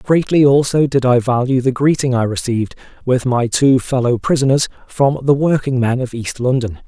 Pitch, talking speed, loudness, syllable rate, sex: 130 Hz, 185 wpm, -15 LUFS, 5.1 syllables/s, male